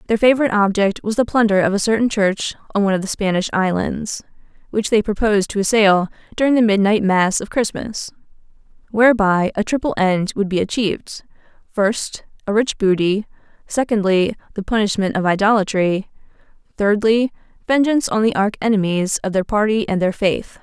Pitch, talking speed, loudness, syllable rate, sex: 205 Hz, 160 wpm, -18 LUFS, 5.5 syllables/s, female